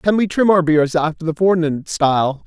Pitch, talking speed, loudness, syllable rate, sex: 165 Hz, 220 wpm, -16 LUFS, 5.0 syllables/s, male